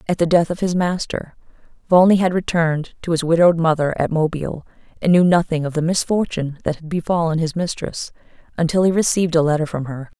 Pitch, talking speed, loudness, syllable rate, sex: 165 Hz, 195 wpm, -18 LUFS, 6.2 syllables/s, female